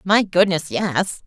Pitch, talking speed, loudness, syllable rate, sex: 180 Hz, 145 wpm, -19 LUFS, 3.5 syllables/s, female